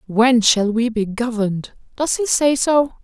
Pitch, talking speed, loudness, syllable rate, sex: 240 Hz, 180 wpm, -17 LUFS, 4.2 syllables/s, female